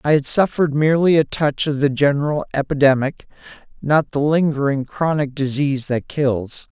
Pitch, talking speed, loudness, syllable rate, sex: 145 Hz, 150 wpm, -18 LUFS, 5.2 syllables/s, male